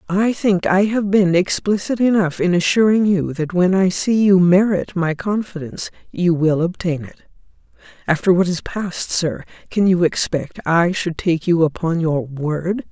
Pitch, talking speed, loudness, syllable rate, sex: 180 Hz, 170 wpm, -18 LUFS, 4.4 syllables/s, female